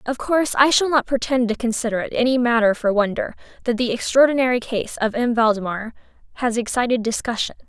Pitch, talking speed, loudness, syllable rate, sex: 240 Hz, 180 wpm, -20 LUFS, 6.0 syllables/s, female